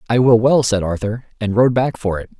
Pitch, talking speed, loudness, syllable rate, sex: 115 Hz, 250 wpm, -17 LUFS, 5.5 syllables/s, male